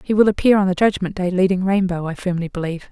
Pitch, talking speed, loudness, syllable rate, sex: 185 Hz, 245 wpm, -18 LUFS, 6.6 syllables/s, female